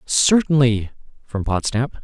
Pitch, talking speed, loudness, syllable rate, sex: 130 Hz, 90 wpm, -18 LUFS, 3.9 syllables/s, male